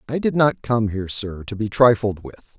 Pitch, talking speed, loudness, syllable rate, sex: 115 Hz, 230 wpm, -20 LUFS, 5.5 syllables/s, male